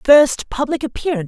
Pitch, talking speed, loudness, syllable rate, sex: 265 Hz, 140 wpm, -17 LUFS, 5.7 syllables/s, female